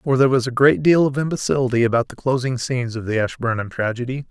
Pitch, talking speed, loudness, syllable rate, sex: 125 Hz, 225 wpm, -19 LUFS, 6.6 syllables/s, male